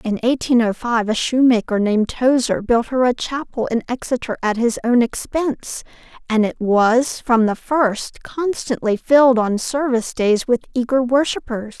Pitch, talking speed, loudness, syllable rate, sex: 240 Hz, 165 wpm, -18 LUFS, 4.6 syllables/s, female